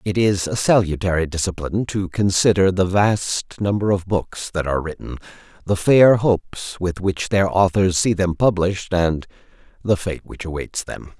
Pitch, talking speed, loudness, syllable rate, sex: 95 Hz, 165 wpm, -19 LUFS, 4.7 syllables/s, male